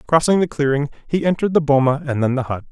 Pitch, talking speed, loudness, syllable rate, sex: 145 Hz, 245 wpm, -18 LUFS, 7.0 syllables/s, male